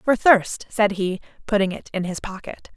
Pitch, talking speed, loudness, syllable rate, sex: 200 Hz, 195 wpm, -21 LUFS, 4.7 syllables/s, female